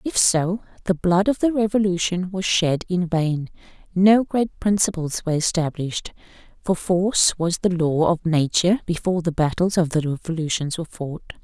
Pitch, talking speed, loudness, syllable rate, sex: 175 Hz, 165 wpm, -21 LUFS, 5.1 syllables/s, female